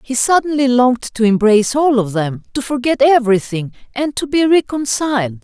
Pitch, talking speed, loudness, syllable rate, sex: 245 Hz, 165 wpm, -15 LUFS, 5.4 syllables/s, female